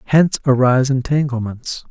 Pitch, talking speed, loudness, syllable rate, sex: 135 Hz, 95 wpm, -17 LUFS, 5.5 syllables/s, male